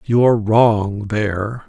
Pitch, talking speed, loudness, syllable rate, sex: 110 Hz, 145 wpm, -17 LUFS, 3.8 syllables/s, male